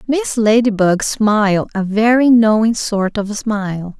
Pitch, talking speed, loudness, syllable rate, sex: 215 Hz, 135 wpm, -15 LUFS, 4.0 syllables/s, female